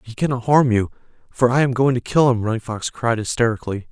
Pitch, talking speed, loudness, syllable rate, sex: 120 Hz, 230 wpm, -19 LUFS, 6.2 syllables/s, male